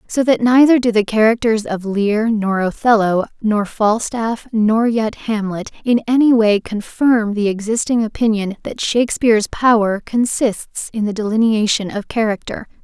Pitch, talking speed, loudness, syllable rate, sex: 220 Hz, 145 wpm, -16 LUFS, 4.5 syllables/s, female